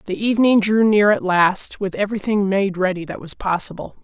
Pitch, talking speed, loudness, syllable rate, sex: 195 Hz, 195 wpm, -18 LUFS, 5.5 syllables/s, female